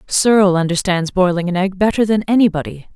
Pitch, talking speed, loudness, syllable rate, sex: 190 Hz, 185 wpm, -15 LUFS, 5.8 syllables/s, female